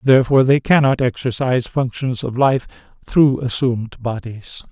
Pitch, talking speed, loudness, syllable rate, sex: 125 Hz, 125 wpm, -17 LUFS, 5.0 syllables/s, male